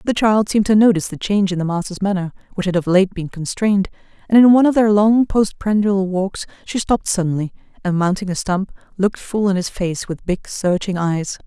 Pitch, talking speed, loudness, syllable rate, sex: 195 Hz, 215 wpm, -18 LUFS, 5.8 syllables/s, female